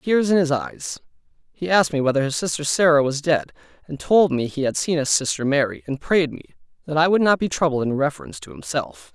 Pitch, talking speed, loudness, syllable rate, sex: 150 Hz, 235 wpm, -20 LUFS, 6.2 syllables/s, male